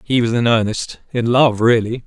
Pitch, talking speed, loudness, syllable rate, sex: 115 Hz, 205 wpm, -16 LUFS, 4.8 syllables/s, male